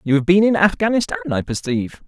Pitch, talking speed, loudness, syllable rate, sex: 165 Hz, 200 wpm, -18 LUFS, 6.6 syllables/s, male